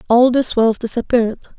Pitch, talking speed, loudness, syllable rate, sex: 235 Hz, 150 wpm, -16 LUFS, 5.7 syllables/s, female